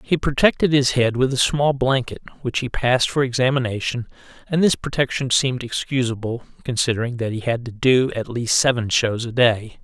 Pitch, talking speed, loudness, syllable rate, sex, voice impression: 125 Hz, 185 wpm, -20 LUFS, 5.4 syllables/s, male, very masculine, adult-like, slightly middle-aged, slightly thick, tensed, powerful, slightly bright, slightly soft, slightly muffled, fluent, slightly raspy, slightly cool, intellectual, refreshing, very sincere, calm, slightly mature, friendly, reassuring, slightly unique, elegant, slightly wild, slightly lively, kind, slightly modest